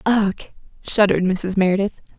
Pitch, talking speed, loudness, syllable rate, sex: 195 Hz, 110 wpm, -19 LUFS, 5.3 syllables/s, female